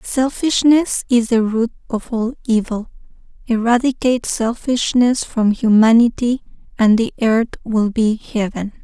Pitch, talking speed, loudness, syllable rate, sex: 230 Hz, 115 wpm, -17 LUFS, 4.3 syllables/s, female